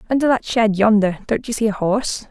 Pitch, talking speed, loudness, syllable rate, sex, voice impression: 220 Hz, 235 wpm, -18 LUFS, 5.9 syllables/s, female, very feminine, young, adult-like, very thin, very relaxed, very weak, dark, very soft, slightly muffled, very fluent, raspy, very cute, very intellectual, refreshing, sincere, very calm, very friendly, very reassuring, very unique, very elegant, slightly wild, very sweet, slightly lively, slightly sharp, very modest, very light